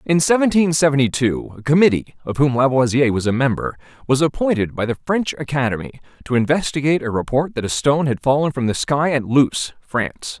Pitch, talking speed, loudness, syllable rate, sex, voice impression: 135 Hz, 190 wpm, -18 LUFS, 5.9 syllables/s, male, masculine, tensed, powerful, bright, clear, fluent, cool, intellectual, slightly friendly, wild, lively, slightly strict, slightly intense